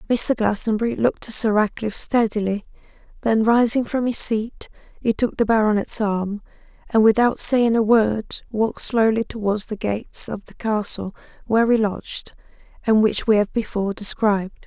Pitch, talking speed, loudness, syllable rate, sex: 220 Hz, 160 wpm, -20 LUFS, 5.1 syllables/s, female